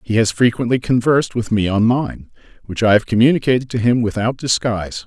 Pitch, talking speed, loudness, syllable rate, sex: 115 Hz, 190 wpm, -17 LUFS, 5.9 syllables/s, male